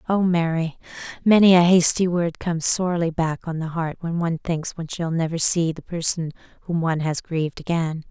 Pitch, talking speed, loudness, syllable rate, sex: 165 Hz, 195 wpm, -21 LUFS, 5.6 syllables/s, female